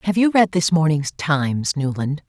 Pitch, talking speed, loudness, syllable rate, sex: 160 Hz, 185 wpm, -19 LUFS, 4.7 syllables/s, female